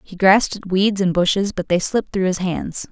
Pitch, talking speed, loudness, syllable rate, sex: 190 Hz, 245 wpm, -18 LUFS, 5.3 syllables/s, female